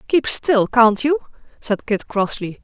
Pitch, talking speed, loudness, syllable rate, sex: 240 Hz, 160 wpm, -18 LUFS, 3.7 syllables/s, female